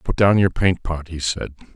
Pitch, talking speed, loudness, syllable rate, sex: 85 Hz, 240 wpm, -20 LUFS, 4.8 syllables/s, male